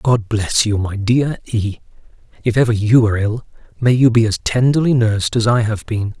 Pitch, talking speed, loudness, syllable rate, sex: 115 Hz, 205 wpm, -16 LUFS, 5.2 syllables/s, male